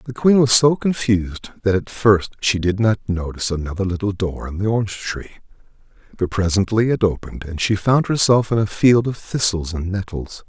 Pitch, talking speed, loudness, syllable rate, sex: 100 Hz, 195 wpm, -19 LUFS, 5.3 syllables/s, male